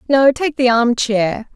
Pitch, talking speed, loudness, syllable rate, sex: 245 Hz, 195 wpm, -15 LUFS, 3.7 syllables/s, female